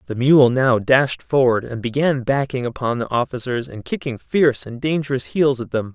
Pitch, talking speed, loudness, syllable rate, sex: 125 Hz, 190 wpm, -19 LUFS, 5.0 syllables/s, male